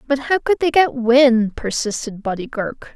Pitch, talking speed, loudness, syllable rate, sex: 250 Hz, 185 wpm, -18 LUFS, 4.7 syllables/s, female